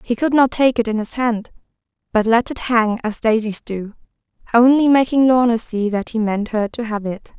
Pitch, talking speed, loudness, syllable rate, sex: 230 Hz, 210 wpm, -17 LUFS, 5.0 syllables/s, female